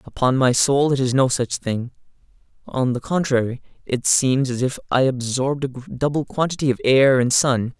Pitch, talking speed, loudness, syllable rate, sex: 130 Hz, 185 wpm, -20 LUFS, 4.9 syllables/s, male